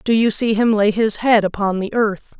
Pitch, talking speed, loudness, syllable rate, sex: 215 Hz, 250 wpm, -17 LUFS, 4.9 syllables/s, female